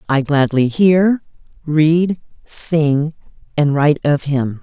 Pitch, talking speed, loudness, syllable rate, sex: 150 Hz, 115 wpm, -16 LUFS, 3.2 syllables/s, female